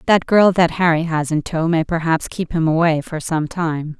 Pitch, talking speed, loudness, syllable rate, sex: 165 Hz, 225 wpm, -18 LUFS, 4.7 syllables/s, female